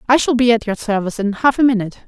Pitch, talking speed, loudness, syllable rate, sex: 230 Hz, 290 wpm, -16 LUFS, 7.7 syllables/s, female